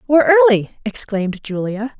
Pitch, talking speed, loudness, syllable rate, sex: 240 Hz, 120 wpm, -16 LUFS, 6.2 syllables/s, female